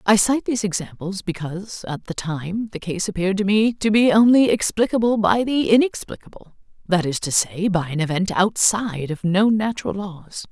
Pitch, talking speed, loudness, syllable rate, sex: 200 Hz, 175 wpm, -20 LUFS, 5.2 syllables/s, female